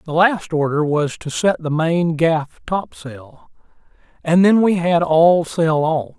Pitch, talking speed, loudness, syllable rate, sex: 160 Hz, 165 wpm, -17 LUFS, 3.7 syllables/s, male